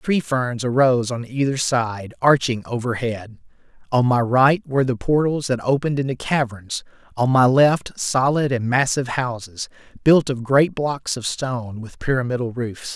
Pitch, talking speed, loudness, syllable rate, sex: 125 Hz, 160 wpm, -20 LUFS, 4.7 syllables/s, male